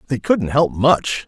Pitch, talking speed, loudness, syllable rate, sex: 130 Hz, 190 wpm, -17 LUFS, 3.7 syllables/s, male